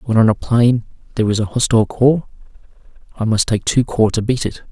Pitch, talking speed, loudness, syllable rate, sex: 115 Hz, 215 wpm, -16 LUFS, 5.8 syllables/s, male